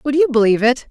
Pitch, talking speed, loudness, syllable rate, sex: 255 Hz, 265 wpm, -15 LUFS, 7.4 syllables/s, female